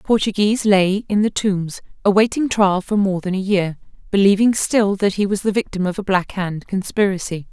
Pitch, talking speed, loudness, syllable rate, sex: 195 Hz, 190 wpm, -18 LUFS, 5.1 syllables/s, female